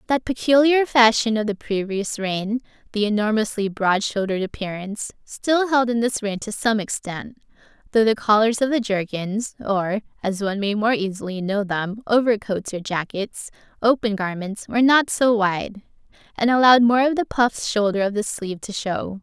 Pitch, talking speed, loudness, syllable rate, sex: 215 Hz, 165 wpm, -21 LUFS, 5.0 syllables/s, female